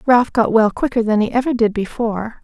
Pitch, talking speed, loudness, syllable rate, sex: 230 Hz, 220 wpm, -17 LUFS, 5.6 syllables/s, female